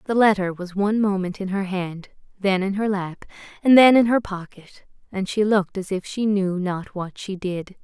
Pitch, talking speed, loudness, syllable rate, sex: 195 Hz, 215 wpm, -21 LUFS, 4.9 syllables/s, female